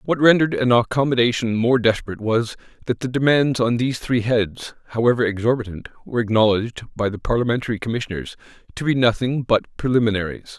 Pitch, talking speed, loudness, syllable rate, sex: 120 Hz, 155 wpm, -20 LUFS, 6.4 syllables/s, male